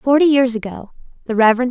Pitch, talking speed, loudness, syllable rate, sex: 245 Hz, 175 wpm, -15 LUFS, 5.3 syllables/s, female